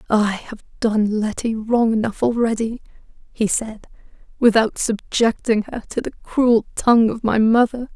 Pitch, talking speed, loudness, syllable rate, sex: 225 Hz, 145 wpm, -19 LUFS, 4.4 syllables/s, female